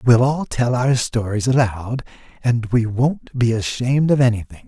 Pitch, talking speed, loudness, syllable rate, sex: 120 Hz, 165 wpm, -19 LUFS, 4.6 syllables/s, male